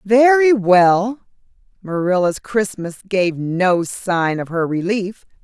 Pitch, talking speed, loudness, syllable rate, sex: 195 Hz, 110 wpm, -17 LUFS, 3.4 syllables/s, female